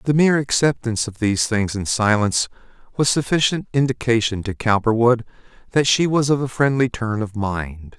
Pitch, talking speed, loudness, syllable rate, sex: 120 Hz, 165 wpm, -19 LUFS, 5.3 syllables/s, male